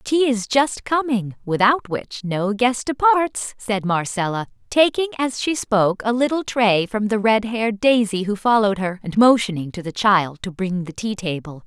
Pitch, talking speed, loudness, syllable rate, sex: 215 Hz, 185 wpm, -20 LUFS, 4.6 syllables/s, female